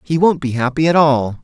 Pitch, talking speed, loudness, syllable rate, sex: 140 Hz, 250 wpm, -15 LUFS, 5.3 syllables/s, male